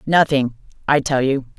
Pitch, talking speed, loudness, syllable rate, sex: 135 Hz, 150 wpm, -18 LUFS, 4.7 syllables/s, female